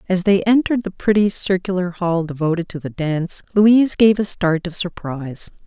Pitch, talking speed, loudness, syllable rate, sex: 185 Hz, 180 wpm, -18 LUFS, 5.3 syllables/s, female